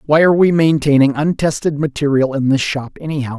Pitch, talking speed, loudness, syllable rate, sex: 145 Hz, 175 wpm, -15 LUFS, 6.0 syllables/s, male